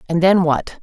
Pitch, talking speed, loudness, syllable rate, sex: 175 Hz, 220 wpm, -16 LUFS, 4.8 syllables/s, female